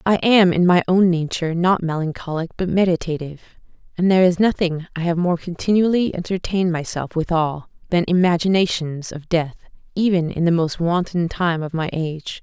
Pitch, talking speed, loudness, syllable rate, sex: 175 Hz, 165 wpm, -19 LUFS, 5.4 syllables/s, female